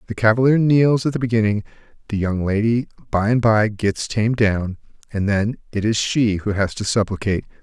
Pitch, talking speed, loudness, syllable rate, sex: 110 Hz, 190 wpm, -19 LUFS, 5.4 syllables/s, male